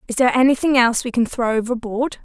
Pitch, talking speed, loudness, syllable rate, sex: 240 Hz, 215 wpm, -18 LUFS, 6.8 syllables/s, female